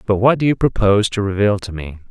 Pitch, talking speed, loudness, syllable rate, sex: 105 Hz, 255 wpm, -16 LUFS, 6.4 syllables/s, male